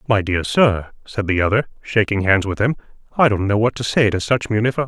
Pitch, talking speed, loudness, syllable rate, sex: 110 Hz, 235 wpm, -18 LUFS, 5.6 syllables/s, male